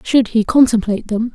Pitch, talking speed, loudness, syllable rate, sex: 225 Hz, 180 wpm, -15 LUFS, 5.6 syllables/s, female